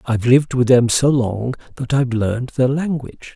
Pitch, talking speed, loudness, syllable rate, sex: 125 Hz, 195 wpm, -17 LUFS, 5.7 syllables/s, male